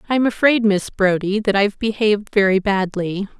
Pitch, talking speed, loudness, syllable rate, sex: 205 Hz, 160 wpm, -18 LUFS, 5.2 syllables/s, female